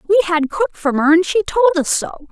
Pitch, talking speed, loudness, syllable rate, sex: 350 Hz, 260 wpm, -16 LUFS, 5.3 syllables/s, female